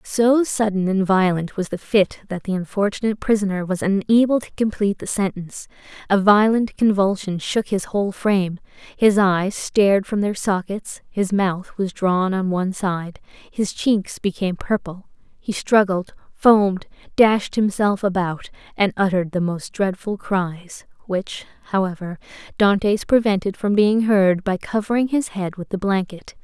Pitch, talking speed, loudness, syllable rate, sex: 195 Hz, 150 wpm, -20 LUFS, 4.6 syllables/s, female